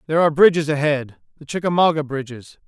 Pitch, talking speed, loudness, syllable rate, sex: 150 Hz, 135 wpm, -18 LUFS, 6.7 syllables/s, male